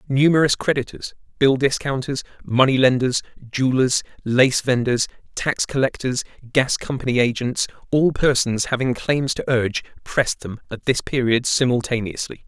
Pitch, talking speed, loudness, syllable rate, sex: 130 Hz, 125 wpm, -20 LUFS, 5.0 syllables/s, male